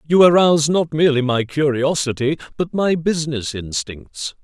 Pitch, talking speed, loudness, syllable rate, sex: 145 Hz, 135 wpm, -18 LUFS, 5.0 syllables/s, male